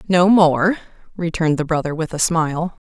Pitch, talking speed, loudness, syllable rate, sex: 165 Hz, 170 wpm, -18 LUFS, 5.4 syllables/s, female